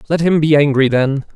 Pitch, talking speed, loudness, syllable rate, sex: 145 Hz, 220 wpm, -14 LUFS, 5.4 syllables/s, male